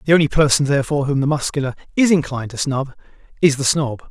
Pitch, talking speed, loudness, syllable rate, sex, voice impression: 140 Hz, 205 wpm, -18 LUFS, 7.2 syllables/s, male, masculine, very adult-like, slightly muffled, fluent, cool